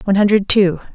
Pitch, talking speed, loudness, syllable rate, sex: 195 Hz, 190 wpm, -14 LUFS, 7.1 syllables/s, female